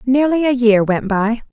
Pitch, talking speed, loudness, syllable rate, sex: 240 Hz, 195 wpm, -15 LUFS, 4.6 syllables/s, female